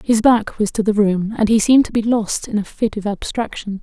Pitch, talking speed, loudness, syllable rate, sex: 215 Hz, 265 wpm, -17 LUFS, 5.4 syllables/s, female